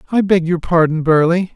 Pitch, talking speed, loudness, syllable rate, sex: 170 Hz, 195 wpm, -15 LUFS, 5.4 syllables/s, male